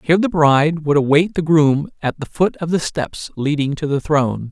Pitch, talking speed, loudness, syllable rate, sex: 155 Hz, 225 wpm, -17 LUFS, 5.2 syllables/s, male